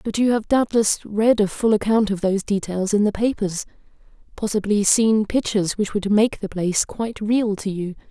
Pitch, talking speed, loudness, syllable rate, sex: 210 Hz, 190 wpm, -20 LUFS, 5.2 syllables/s, female